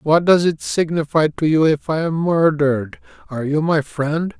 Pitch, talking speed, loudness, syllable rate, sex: 155 Hz, 190 wpm, -18 LUFS, 4.7 syllables/s, male